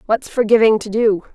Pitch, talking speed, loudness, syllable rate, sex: 220 Hz, 180 wpm, -16 LUFS, 5.4 syllables/s, female